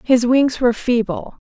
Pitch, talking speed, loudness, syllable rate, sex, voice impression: 245 Hz, 160 wpm, -17 LUFS, 4.6 syllables/s, female, feminine, slightly adult-like, clear, sincere, friendly, slightly kind